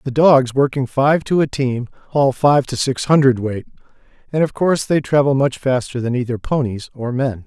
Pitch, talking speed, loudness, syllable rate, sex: 135 Hz, 195 wpm, -17 LUFS, 5.0 syllables/s, male